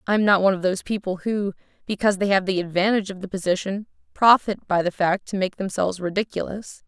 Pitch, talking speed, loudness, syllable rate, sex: 195 Hz, 210 wpm, -22 LUFS, 6.6 syllables/s, female